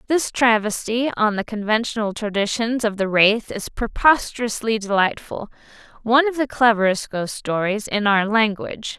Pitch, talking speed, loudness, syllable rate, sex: 220 Hz, 140 wpm, -20 LUFS, 4.9 syllables/s, female